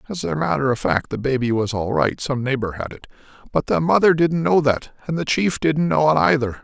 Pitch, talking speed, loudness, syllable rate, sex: 130 Hz, 225 wpm, -20 LUFS, 5.4 syllables/s, male